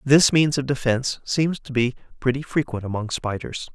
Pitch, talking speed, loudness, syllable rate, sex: 130 Hz, 175 wpm, -22 LUFS, 5.1 syllables/s, male